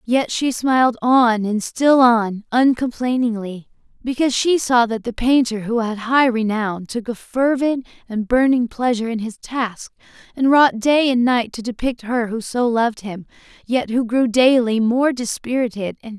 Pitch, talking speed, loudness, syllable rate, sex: 240 Hz, 175 wpm, -18 LUFS, 4.4 syllables/s, female